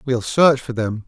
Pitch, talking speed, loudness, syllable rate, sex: 125 Hz, 225 wpm, -18 LUFS, 4.2 syllables/s, male